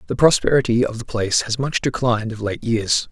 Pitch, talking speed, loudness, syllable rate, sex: 115 Hz, 210 wpm, -19 LUFS, 5.8 syllables/s, male